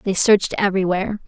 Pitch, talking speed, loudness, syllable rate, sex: 195 Hz, 140 wpm, -18 LUFS, 7.1 syllables/s, female